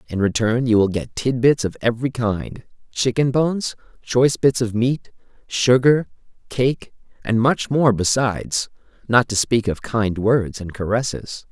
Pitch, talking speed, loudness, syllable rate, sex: 115 Hz, 150 wpm, -19 LUFS, 4.6 syllables/s, male